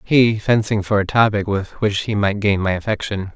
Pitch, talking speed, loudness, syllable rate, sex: 105 Hz, 215 wpm, -18 LUFS, 4.9 syllables/s, male